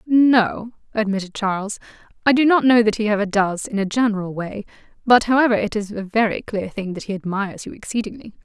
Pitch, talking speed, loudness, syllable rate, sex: 215 Hz, 200 wpm, -20 LUFS, 5.9 syllables/s, female